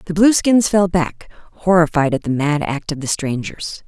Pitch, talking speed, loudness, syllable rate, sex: 165 Hz, 185 wpm, -17 LUFS, 4.8 syllables/s, female